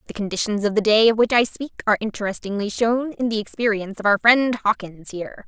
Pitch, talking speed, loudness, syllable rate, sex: 215 Hz, 220 wpm, -20 LUFS, 6.4 syllables/s, female